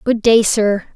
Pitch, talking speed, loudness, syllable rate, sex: 215 Hz, 190 wpm, -14 LUFS, 3.7 syllables/s, female